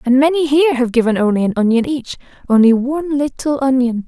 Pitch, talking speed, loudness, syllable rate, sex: 260 Hz, 175 wpm, -15 LUFS, 6.1 syllables/s, female